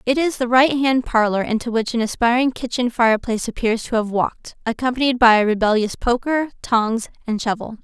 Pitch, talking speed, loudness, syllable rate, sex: 235 Hz, 175 wpm, -19 LUFS, 5.6 syllables/s, female